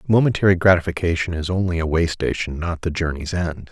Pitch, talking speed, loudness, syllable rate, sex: 85 Hz, 180 wpm, -20 LUFS, 6.0 syllables/s, male